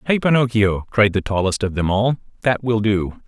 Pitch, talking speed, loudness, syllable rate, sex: 110 Hz, 200 wpm, -19 LUFS, 5.0 syllables/s, male